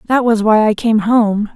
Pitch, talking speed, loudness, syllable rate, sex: 220 Hz, 230 wpm, -13 LUFS, 4.4 syllables/s, female